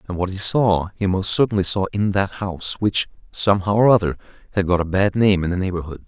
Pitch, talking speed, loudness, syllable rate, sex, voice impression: 95 Hz, 225 wpm, -20 LUFS, 6.0 syllables/s, male, very masculine, adult-like, thick, cool, sincere, slightly mature